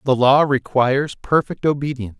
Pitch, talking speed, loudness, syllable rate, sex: 135 Hz, 135 wpm, -18 LUFS, 5.3 syllables/s, male